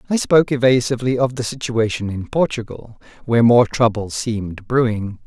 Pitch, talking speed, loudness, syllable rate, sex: 120 Hz, 150 wpm, -18 LUFS, 5.5 syllables/s, male